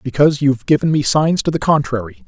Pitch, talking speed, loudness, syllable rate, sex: 140 Hz, 210 wpm, -16 LUFS, 6.5 syllables/s, male